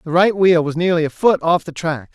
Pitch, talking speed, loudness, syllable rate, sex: 165 Hz, 280 wpm, -16 LUFS, 5.5 syllables/s, male